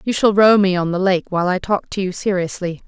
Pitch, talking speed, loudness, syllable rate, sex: 190 Hz, 270 wpm, -17 LUFS, 5.8 syllables/s, female